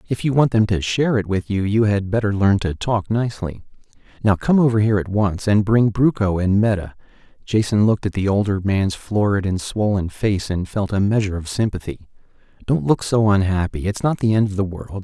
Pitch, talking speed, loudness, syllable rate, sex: 100 Hz, 210 wpm, -19 LUFS, 5.5 syllables/s, male